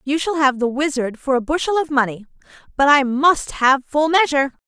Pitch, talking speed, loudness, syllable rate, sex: 280 Hz, 205 wpm, -18 LUFS, 5.2 syllables/s, female